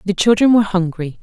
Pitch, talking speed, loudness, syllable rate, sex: 195 Hz, 195 wpm, -15 LUFS, 6.3 syllables/s, female